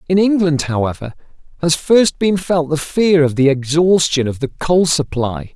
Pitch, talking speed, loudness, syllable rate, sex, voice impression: 160 Hz, 175 wpm, -15 LUFS, 4.5 syllables/s, male, very masculine, adult-like, slightly middle-aged, slightly thick, tensed, slightly powerful, bright, slightly hard, clear, fluent, cool, slightly intellectual, slightly refreshing, sincere, slightly calm, friendly, slightly reassuring, slightly unique, slightly wild, slightly lively, slightly strict, slightly intense